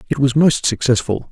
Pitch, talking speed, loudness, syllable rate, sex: 130 Hz, 180 wpm, -16 LUFS, 5.4 syllables/s, male